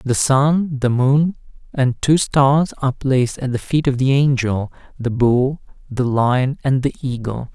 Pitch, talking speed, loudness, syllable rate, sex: 130 Hz, 175 wpm, -18 LUFS, 4.0 syllables/s, male